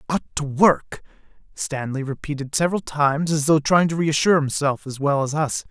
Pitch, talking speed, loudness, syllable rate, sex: 150 Hz, 190 wpm, -21 LUFS, 5.4 syllables/s, male